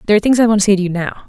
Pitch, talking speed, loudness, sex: 205 Hz, 470 wpm, -14 LUFS, female